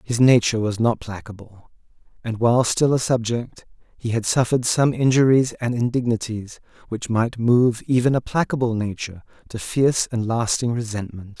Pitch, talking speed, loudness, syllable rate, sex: 120 Hz, 155 wpm, -20 LUFS, 5.2 syllables/s, male